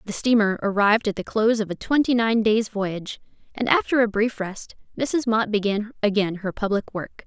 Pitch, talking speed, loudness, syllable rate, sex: 215 Hz, 200 wpm, -22 LUFS, 5.3 syllables/s, female